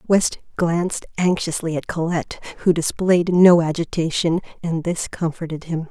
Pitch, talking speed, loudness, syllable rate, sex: 170 Hz, 130 wpm, -20 LUFS, 4.9 syllables/s, female